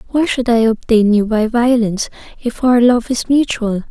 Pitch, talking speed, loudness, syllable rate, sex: 235 Hz, 185 wpm, -15 LUFS, 4.8 syllables/s, female